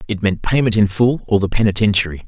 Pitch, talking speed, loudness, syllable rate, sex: 105 Hz, 210 wpm, -16 LUFS, 6.4 syllables/s, male